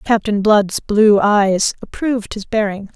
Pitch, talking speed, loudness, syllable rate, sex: 210 Hz, 140 wpm, -16 LUFS, 4.1 syllables/s, female